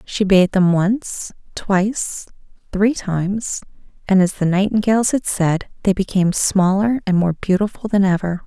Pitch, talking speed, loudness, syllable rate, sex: 195 Hz, 150 wpm, -18 LUFS, 4.7 syllables/s, female